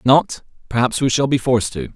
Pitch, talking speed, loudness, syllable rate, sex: 120 Hz, 245 wpm, -18 LUFS, 6.0 syllables/s, male